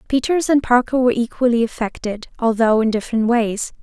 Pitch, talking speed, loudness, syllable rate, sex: 235 Hz, 155 wpm, -18 LUFS, 5.7 syllables/s, female